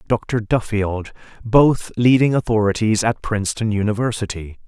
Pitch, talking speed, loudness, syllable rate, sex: 110 Hz, 105 wpm, -19 LUFS, 4.7 syllables/s, male